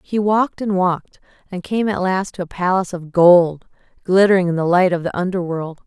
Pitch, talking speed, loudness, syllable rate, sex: 185 Hz, 205 wpm, -17 LUFS, 5.6 syllables/s, female